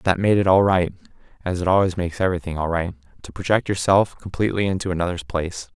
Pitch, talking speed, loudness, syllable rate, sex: 90 Hz, 185 wpm, -21 LUFS, 6.8 syllables/s, male